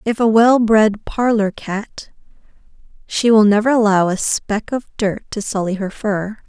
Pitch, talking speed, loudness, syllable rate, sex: 215 Hz, 165 wpm, -16 LUFS, 4.2 syllables/s, female